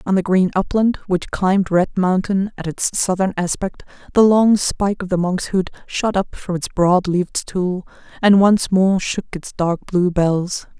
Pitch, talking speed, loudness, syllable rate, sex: 185 Hz, 185 wpm, -18 LUFS, 4.4 syllables/s, female